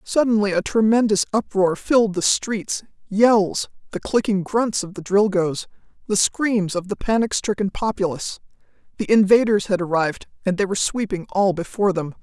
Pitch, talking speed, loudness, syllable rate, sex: 200 Hz, 155 wpm, -20 LUFS, 5.1 syllables/s, female